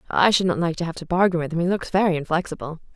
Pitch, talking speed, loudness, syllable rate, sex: 170 Hz, 285 wpm, -22 LUFS, 7.2 syllables/s, female